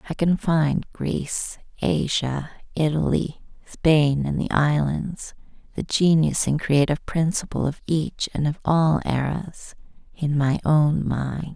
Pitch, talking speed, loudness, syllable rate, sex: 150 Hz, 125 wpm, -23 LUFS, 3.8 syllables/s, female